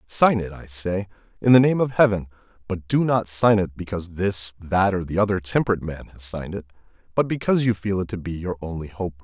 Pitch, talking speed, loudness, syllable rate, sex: 95 Hz, 225 wpm, -22 LUFS, 6.0 syllables/s, male